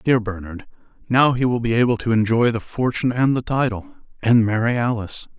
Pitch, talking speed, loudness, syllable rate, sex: 115 Hz, 190 wpm, -19 LUFS, 5.7 syllables/s, male